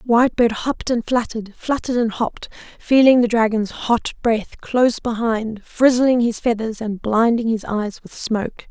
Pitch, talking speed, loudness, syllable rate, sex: 230 Hz, 160 wpm, -19 LUFS, 4.8 syllables/s, female